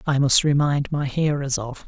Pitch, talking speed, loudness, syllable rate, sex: 140 Hz, 190 wpm, -21 LUFS, 4.6 syllables/s, male